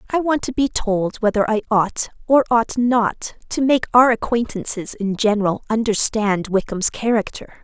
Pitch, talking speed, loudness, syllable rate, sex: 220 Hz, 155 wpm, -19 LUFS, 4.5 syllables/s, female